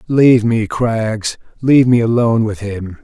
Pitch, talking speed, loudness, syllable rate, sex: 115 Hz, 140 wpm, -14 LUFS, 4.6 syllables/s, male